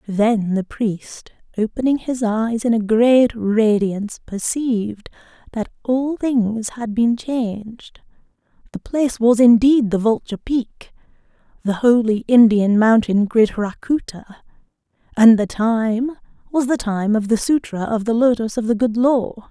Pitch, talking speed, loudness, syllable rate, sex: 225 Hz, 140 wpm, -18 LUFS, 4.0 syllables/s, female